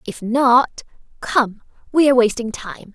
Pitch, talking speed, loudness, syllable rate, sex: 245 Hz, 120 wpm, -17 LUFS, 4.3 syllables/s, female